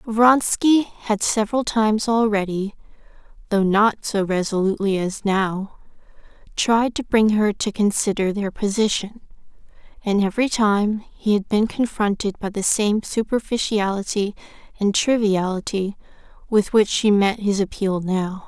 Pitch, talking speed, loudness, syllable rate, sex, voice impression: 210 Hz, 125 wpm, -20 LUFS, 4.4 syllables/s, female, very feminine, very young, very thin, relaxed, weak, slightly dark, slightly soft, very clear, very fluent, very cute, intellectual, very refreshing, slightly sincere, slightly calm, very friendly, very reassuring, very unique, slightly elegant, wild, sweet, lively, kind, slightly intense, slightly sharp, very light